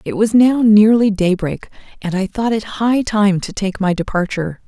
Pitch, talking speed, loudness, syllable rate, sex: 205 Hz, 195 wpm, -15 LUFS, 4.7 syllables/s, female